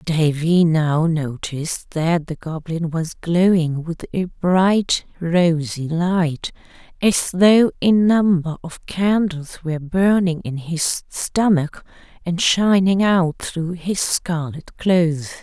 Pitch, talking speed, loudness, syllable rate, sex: 170 Hz, 120 wpm, -19 LUFS, 3.5 syllables/s, female